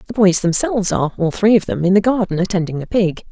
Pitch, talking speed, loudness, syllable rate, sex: 190 Hz, 255 wpm, -16 LUFS, 6.6 syllables/s, female